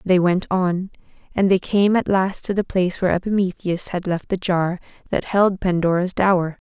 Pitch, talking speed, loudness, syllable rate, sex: 185 Hz, 190 wpm, -20 LUFS, 5.0 syllables/s, female